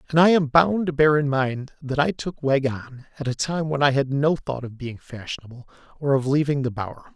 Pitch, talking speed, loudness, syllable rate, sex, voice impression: 140 Hz, 245 wpm, -22 LUFS, 5.3 syllables/s, male, masculine, slightly middle-aged, soft, slightly muffled, sincere, calm, reassuring, slightly sweet, kind